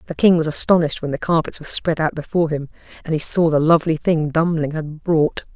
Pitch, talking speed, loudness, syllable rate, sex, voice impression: 160 Hz, 225 wpm, -19 LUFS, 6.3 syllables/s, female, very feminine, very young, tensed, powerful, very bright, soft, very clear, very fluent, very cute, slightly intellectual, very refreshing, sincere, calm, friendly, slightly reassuring, very unique, slightly elegant, wild, sweet, lively, slightly kind, very sharp